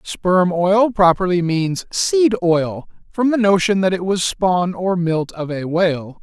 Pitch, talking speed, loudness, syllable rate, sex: 180 Hz, 175 wpm, -17 LUFS, 3.8 syllables/s, male